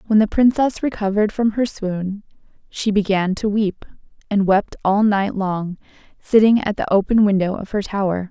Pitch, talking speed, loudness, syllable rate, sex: 205 Hz, 175 wpm, -19 LUFS, 4.9 syllables/s, female